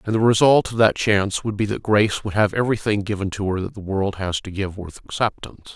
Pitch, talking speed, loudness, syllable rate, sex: 105 Hz, 250 wpm, -20 LUFS, 6.1 syllables/s, male